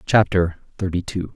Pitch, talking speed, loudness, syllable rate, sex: 95 Hz, 135 wpm, -22 LUFS, 4.9 syllables/s, male